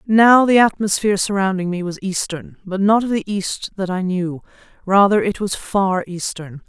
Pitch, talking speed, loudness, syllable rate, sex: 195 Hz, 180 wpm, -18 LUFS, 4.7 syllables/s, female